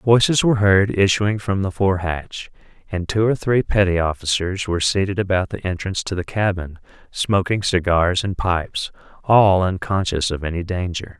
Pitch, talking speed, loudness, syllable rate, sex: 95 Hz, 165 wpm, -19 LUFS, 4.9 syllables/s, male